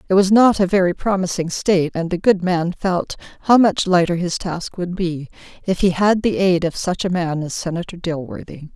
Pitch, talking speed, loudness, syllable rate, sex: 180 Hz, 210 wpm, -18 LUFS, 5.1 syllables/s, female